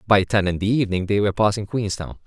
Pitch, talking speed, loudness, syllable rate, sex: 100 Hz, 240 wpm, -21 LUFS, 6.7 syllables/s, male